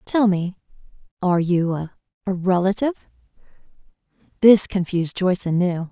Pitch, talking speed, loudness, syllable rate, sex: 185 Hz, 100 wpm, -20 LUFS, 5.4 syllables/s, female